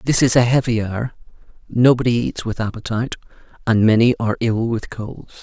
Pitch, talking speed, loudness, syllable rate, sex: 115 Hz, 165 wpm, -18 LUFS, 5.6 syllables/s, male